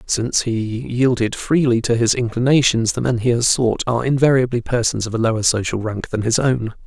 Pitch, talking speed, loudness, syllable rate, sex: 120 Hz, 200 wpm, -18 LUFS, 5.4 syllables/s, male